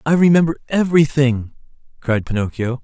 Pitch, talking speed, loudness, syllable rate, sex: 140 Hz, 105 wpm, -17 LUFS, 5.7 syllables/s, male